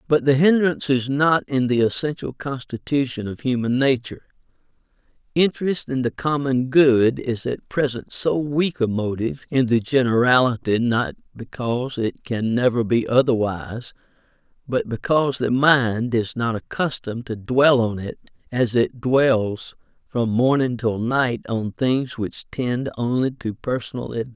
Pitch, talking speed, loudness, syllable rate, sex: 125 Hz, 150 wpm, -21 LUFS, 4.6 syllables/s, male